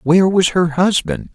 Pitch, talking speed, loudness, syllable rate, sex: 175 Hz, 180 wpm, -15 LUFS, 4.7 syllables/s, male